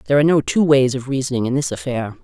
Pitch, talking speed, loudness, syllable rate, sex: 135 Hz, 270 wpm, -18 LUFS, 6.9 syllables/s, female